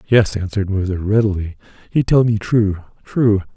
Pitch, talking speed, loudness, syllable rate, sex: 105 Hz, 150 wpm, -18 LUFS, 5.1 syllables/s, male